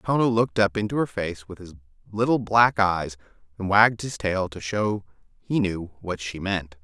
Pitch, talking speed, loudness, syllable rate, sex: 100 Hz, 200 wpm, -24 LUFS, 5.1 syllables/s, male